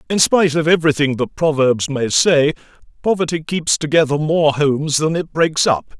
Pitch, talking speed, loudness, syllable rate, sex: 150 Hz, 170 wpm, -16 LUFS, 5.1 syllables/s, male